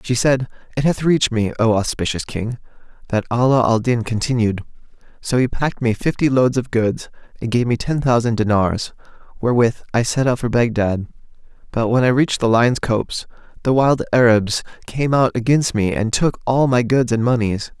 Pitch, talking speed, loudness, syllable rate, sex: 120 Hz, 185 wpm, -18 LUFS, 5.3 syllables/s, male